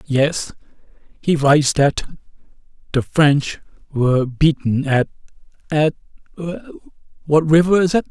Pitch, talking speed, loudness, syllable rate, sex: 150 Hz, 105 wpm, -17 LUFS, 3.9 syllables/s, male